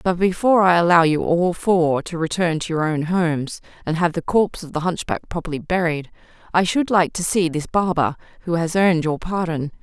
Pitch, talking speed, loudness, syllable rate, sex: 170 Hz, 210 wpm, -20 LUFS, 5.5 syllables/s, female